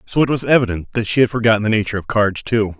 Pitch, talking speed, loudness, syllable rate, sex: 110 Hz, 280 wpm, -17 LUFS, 7.4 syllables/s, male